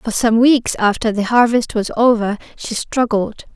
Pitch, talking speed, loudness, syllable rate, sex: 225 Hz, 170 wpm, -16 LUFS, 4.6 syllables/s, female